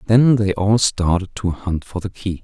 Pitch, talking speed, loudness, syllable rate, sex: 100 Hz, 220 wpm, -18 LUFS, 4.4 syllables/s, male